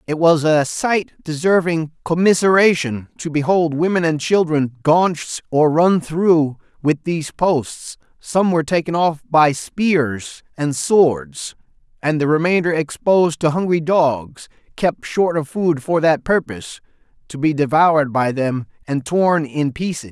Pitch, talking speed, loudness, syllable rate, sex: 160 Hz, 145 wpm, -17 LUFS, 3.9 syllables/s, male